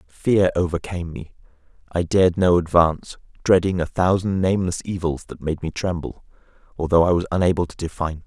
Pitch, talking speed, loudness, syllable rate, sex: 85 Hz, 165 wpm, -21 LUFS, 6.0 syllables/s, male